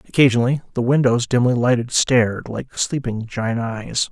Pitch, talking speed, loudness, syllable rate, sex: 120 Hz, 145 wpm, -19 LUFS, 5.0 syllables/s, male